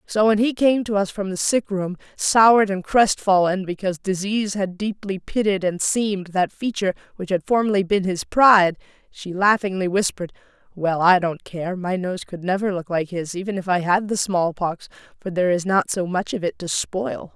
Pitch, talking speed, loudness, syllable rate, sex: 190 Hz, 200 wpm, -21 LUFS, 5.1 syllables/s, female